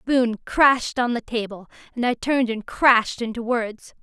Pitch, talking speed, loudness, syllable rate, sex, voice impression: 235 Hz, 195 wpm, -21 LUFS, 5.3 syllables/s, female, feminine, slightly adult-like, slightly bright, slightly clear, slightly cute, sincere